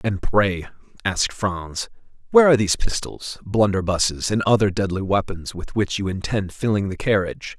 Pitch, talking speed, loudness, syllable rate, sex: 100 Hz, 160 wpm, -21 LUFS, 5.3 syllables/s, male